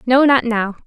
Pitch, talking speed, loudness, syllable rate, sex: 240 Hz, 210 wpm, -15 LUFS, 4.5 syllables/s, female